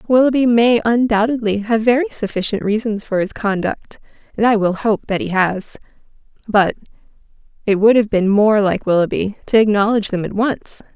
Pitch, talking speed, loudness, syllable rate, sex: 215 Hz, 165 wpm, -16 LUFS, 5.3 syllables/s, female